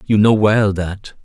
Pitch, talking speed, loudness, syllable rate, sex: 105 Hz, 195 wpm, -15 LUFS, 3.7 syllables/s, male